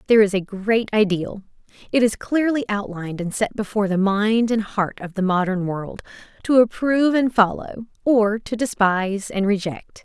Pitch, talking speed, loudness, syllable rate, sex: 210 Hz, 175 wpm, -20 LUFS, 5.0 syllables/s, female